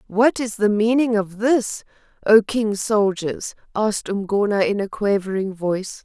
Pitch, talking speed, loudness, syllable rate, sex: 210 Hz, 150 wpm, -20 LUFS, 4.4 syllables/s, female